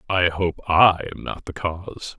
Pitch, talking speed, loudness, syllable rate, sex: 90 Hz, 190 wpm, -21 LUFS, 4.2 syllables/s, male